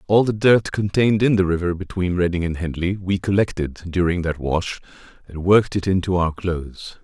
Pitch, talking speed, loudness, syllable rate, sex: 90 Hz, 190 wpm, -20 LUFS, 5.4 syllables/s, male